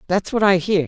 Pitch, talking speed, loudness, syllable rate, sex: 185 Hz, 275 wpm, -18 LUFS, 6.0 syllables/s, female